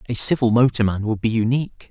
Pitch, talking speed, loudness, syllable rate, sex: 115 Hz, 190 wpm, -19 LUFS, 6.4 syllables/s, male